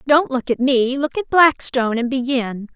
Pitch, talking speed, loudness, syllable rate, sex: 260 Hz, 175 wpm, -18 LUFS, 4.7 syllables/s, female